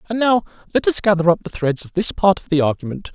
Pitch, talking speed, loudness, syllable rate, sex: 190 Hz, 265 wpm, -18 LUFS, 6.2 syllables/s, male